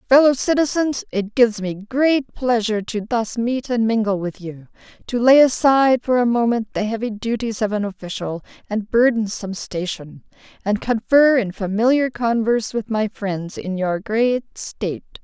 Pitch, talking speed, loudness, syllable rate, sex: 225 Hz, 160 wpm, -19 LUFS, 4.8 syllables/s, female